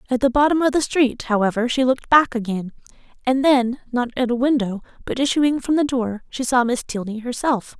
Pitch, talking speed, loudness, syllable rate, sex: 250 Hz, 210 wpm, -20 LUFS, 5.5 syllables/s, female